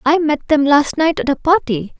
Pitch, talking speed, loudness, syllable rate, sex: 295 Hz, 240 wpm, -15 LUFS, 4.8 syllables/s, female